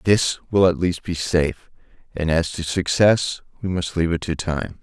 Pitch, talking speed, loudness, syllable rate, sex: 85 Hz, 185 wpm, -21 LUFS, 4.7 syllables/s, male